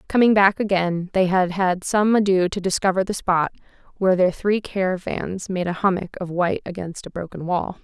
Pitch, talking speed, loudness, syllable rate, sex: 185 Hz, 190 wpm, -21 LUFS, 5.2 syllables/s, female